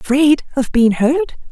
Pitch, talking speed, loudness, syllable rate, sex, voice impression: 270 Hz, 160 wpm, -15 LUFS, 4.0 syllables/s, female, feminine, slightly adult-like, clear, slightly fluent, slightly intellectual, slightly sharp